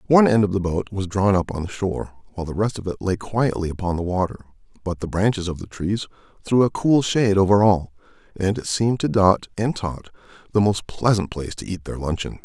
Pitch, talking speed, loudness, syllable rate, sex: 95 Hz, 230 wpm, -22 LUFS, 6.0 syllables/s, male